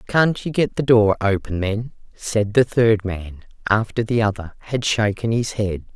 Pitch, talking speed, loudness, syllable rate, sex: 110 Hz, 180 wpm, -20 LUFS, 4.3 syllables/s, female